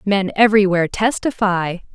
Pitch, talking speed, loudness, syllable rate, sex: 200 Hz, 95 wpm, -17 LUFS, 5.2 syllables/s, female